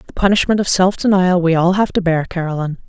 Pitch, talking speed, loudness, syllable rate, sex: 180 Hz, 230 wpm, -15 LUFS, 6.5 syllables/s, female